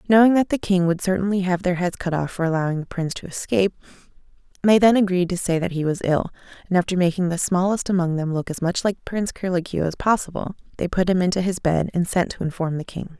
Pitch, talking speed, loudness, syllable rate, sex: 180 Hz, 240 wpm, -22 LUFS, 6.4 syllables/s, female